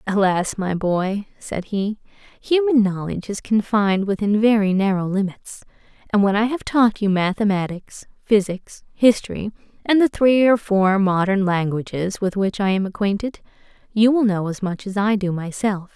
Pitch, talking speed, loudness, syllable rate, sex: 205 Hz, 160 wpm, -20 LUFS, 4.7 syllables/s, female